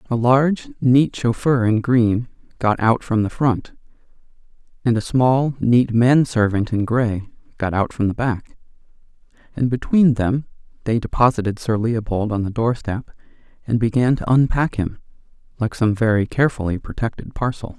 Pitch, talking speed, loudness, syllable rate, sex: 115 Hz, 150 wpm, -19 LUFS, 4.7 syllables/s, male